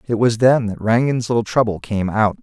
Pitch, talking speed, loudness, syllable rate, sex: 115 Hz, 220 wpm, -18 LUFS, 5.3 syllables/s, male